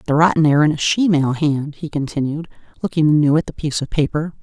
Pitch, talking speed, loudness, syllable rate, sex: 150 Hz, 215 wpm, -18 LUFS, 6.5 syllables/s, female